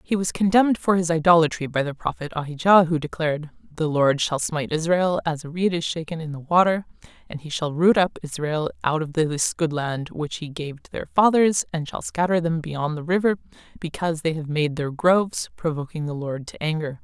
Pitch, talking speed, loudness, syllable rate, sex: 160 Hz, 210 wpm, -22 LUFS, 5.5 syllables/s, female